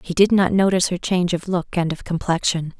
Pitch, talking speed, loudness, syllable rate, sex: 180 Hz, 235 wpm, -20 LUFS, 6.0 syllables/s, female